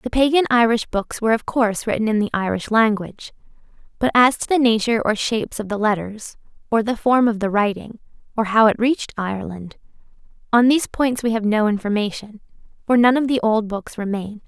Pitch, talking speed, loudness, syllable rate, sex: 225 Hz, 195 wpm, -19 LUFS, 5.9 syllables/s, female